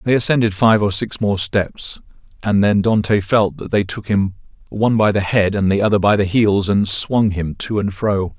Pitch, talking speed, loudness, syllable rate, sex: 105 Hz, 220 wpm, -17 LUFS, 4.8 syllables/s, male